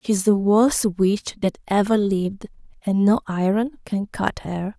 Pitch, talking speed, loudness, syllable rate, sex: 205 Hz, 175 wpm, -21 LUFS, 4.3 syllables/s, female